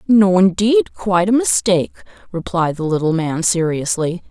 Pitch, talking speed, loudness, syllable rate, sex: 185 Hz, 140 wpm, -16 LUFS, 4.9 syllables/s, female